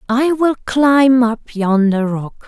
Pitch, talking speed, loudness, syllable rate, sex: 240 Hz, 145 wpm, -15 LUFS, 3.2 syllables/s, female